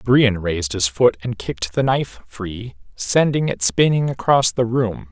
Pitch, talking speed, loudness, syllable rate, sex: 115 Hz, 175 wpm, -19 LUFS, 4.4 syllables/s, male